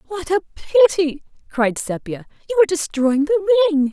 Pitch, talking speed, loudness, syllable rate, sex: 280 Hz, 155 wpm, -18 LUFS, 6.0 syllables/s, female